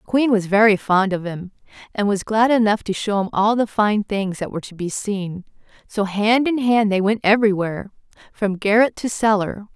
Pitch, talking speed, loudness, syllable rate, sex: 205 Hz, 210 wpm, -19 LUFS, 5.2 syllables/s, female